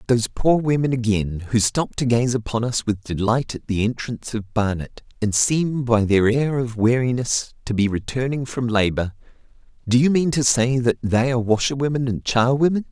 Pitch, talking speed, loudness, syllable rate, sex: 120 Hz, 185 wpm, -21 LUFS, 5.1 syllables/s, male